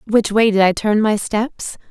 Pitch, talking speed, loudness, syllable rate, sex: 215 Hz, 220 wpm, -16 LUFS, 4.1 syllables/s, female